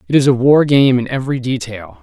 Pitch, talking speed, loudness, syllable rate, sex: 130 Hz, 235 wpm, -14 LUFS, 6.0 syllables/s, male